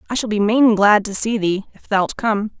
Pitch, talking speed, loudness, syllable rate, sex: 210 Hz, 255 wpm, -17 LUFS, 4.8 syllables/s, female